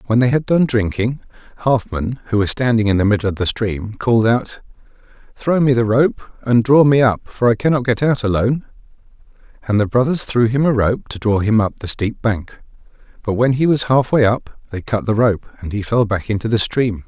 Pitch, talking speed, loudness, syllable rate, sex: 115 Hz, 220 wpm, -17 LUFS, 5.2 syllables/s, male